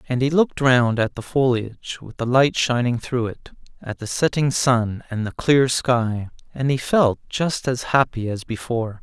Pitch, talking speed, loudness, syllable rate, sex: 125 Hz, 195 wpm, -21 LUFS, 4.5 syllables/s, male